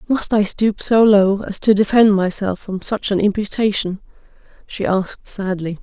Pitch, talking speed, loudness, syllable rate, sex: 200 Hz, 165 wpm, -17 LUFS, 4.7 syllables/s, female